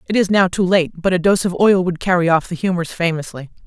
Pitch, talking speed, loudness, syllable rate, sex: 180 Hz, 260 wpm, -17 LUFS, 6.0 syllables/s, female